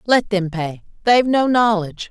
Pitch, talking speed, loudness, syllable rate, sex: 205 Hz, 145 wpm, -18 LUFS, 5.1 syllables/s, female